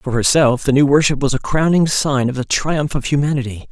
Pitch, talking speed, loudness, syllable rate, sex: 140 Hz, 225 wpm, -16 LUFS, 5.5 syllables/s, male